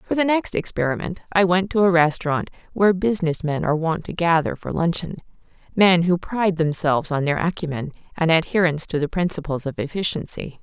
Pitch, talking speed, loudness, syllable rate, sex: 170 Hz, 180 wpm, -21 LUFS, 6.0 syllables/s, female